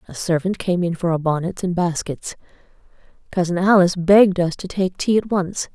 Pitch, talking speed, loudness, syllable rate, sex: 180 Hz, 190 wpm, -19 LUFS, 5.4 syllables/s, female